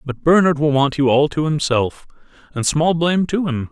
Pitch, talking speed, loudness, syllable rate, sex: 150 Hz, 210 wpm, -17 LUFS, 5.1 syllables/s, male